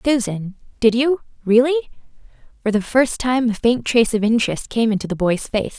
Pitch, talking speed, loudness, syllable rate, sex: 230 Hz, 185 wpm, -19 LUFS, 5.6 syllables/s, female